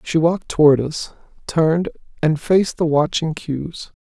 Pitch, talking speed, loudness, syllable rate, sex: 155 Hz, 150 wpm, -19 LUFS, 4.9 syllables/s, male